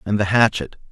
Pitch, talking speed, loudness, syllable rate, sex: 105 Hz, 195 wpm, -17 LUFS, 5.8 syllables/s, male